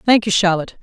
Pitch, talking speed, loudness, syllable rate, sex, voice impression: 195 Hz, 215 wpm, -16 LUFS, 7.0 syllables/s, female, feminine, slightly gender-neutral, very adult-like, very middle-aged, slightly thin, slightly tensed, powerful, dark, very hard, slightly clear, fluent, slightly raspy, cool, intellectual, slightly refreshing, very sincere, very calm, slightly mature, slightly friendly, reassuring, very unique, elegant, very wild, slightly sweet, lively, strict, slightly intense, sharp